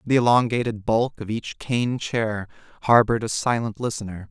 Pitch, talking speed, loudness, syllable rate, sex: 115 Hz, 155 wpm, -23 LUFS, 4.9 syllables/s, male